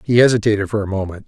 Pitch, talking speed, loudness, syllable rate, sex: 105 Hz, 235 wpm, -17 LUFS, 7.7 syllables/s, male